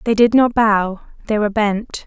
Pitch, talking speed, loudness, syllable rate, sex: 215 Hz, 205 wpm, -16 LUFS, 4.7 syllables/s, female